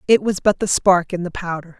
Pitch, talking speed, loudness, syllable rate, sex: 185 Hz, 265 wpm, -18 LUFS, 5.5 syllables/s, female